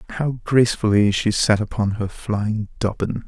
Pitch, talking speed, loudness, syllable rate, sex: 110 Hz, 145 wpm, -20 LUFS, 4.7 syllables/s, male